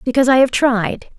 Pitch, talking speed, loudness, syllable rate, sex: 250 Hz, 205 wpm, -15 LUFS, 5.8 syllables/s, female